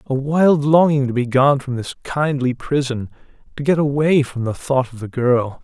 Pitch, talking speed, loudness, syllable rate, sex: 135 Hz, 190 wpm, -18 LUFS, 4.6 syllables/s, male